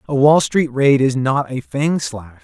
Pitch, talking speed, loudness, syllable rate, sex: 135 Hz, 220 wpm, -16 LUFS, 4.1 syllables/s, male